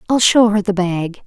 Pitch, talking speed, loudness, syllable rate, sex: 200 Hz, 235 wpm, -15 LUFS, 4.9 syllables/s, female